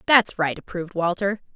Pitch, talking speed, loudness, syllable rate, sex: 185 Hz, 155 wpm, -23 LUFS, 5.6 syllables/s, female